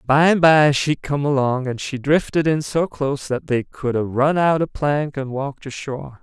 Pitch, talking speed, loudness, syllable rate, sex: 140 Hz, 220 wpm, -19 LUFS, 4.7 syllables/s, male